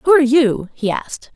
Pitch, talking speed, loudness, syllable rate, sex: 265 Hz, 220 wpm, -16 LUFS, 5.5 syllables/s, female